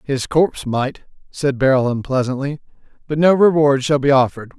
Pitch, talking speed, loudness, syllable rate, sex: 140 Hz, 155 wpm, -17 LUFS, 5.4 syllables/s, male